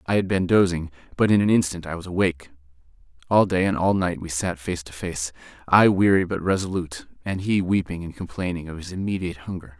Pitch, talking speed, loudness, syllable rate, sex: 90 Hz, 210 wpm, -23 LUFS, 6.0 syllables/s, male